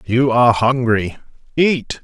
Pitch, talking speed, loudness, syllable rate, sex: 125 Hz, 120 wpm, -15 LUFS, 3.9 syllables/s, male